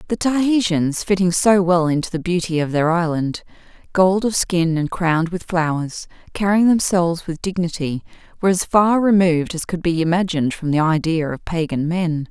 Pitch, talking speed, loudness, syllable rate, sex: 175 Hz, 175 wpm, -19 LUFS, 5.2 syllables/s, female